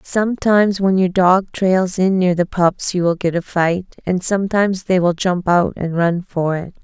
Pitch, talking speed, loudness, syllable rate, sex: 180 Hz, 210 wpm, -17 LUFS, 4.6 syllables/s, female